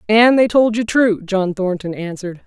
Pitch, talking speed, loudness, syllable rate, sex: 205 Hz, 195 wpm, -16 LUFS, 4.8 syllables/s, female